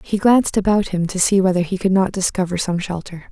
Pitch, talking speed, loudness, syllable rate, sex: 190 Hz, 235 wpm, -18 LUFS, 6.0 syllables/s, female